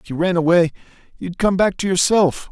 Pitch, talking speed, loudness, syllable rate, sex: 180 Hz, 215 wpm, -17 LUFS, 5.7 syllables/s, male